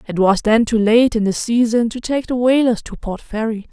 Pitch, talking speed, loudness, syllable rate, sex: 230 Hz, 240 wpm, -16 LUFS, 5.1 syllables/s, female